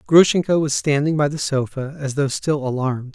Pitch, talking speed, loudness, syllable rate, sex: 145 Hz, 190 wpm, -20 LUFS, 5.4 syllables/s, male